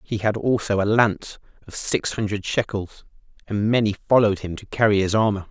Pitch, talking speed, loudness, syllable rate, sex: 105 Hz, 185 wpm, -22 LUFS, 5.7 syllables/s, male